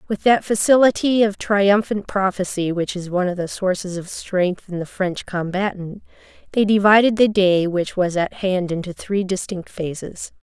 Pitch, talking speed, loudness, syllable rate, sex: 190 Hz, 175 wpm, -19 LUFS, 4.7 syllables/s, female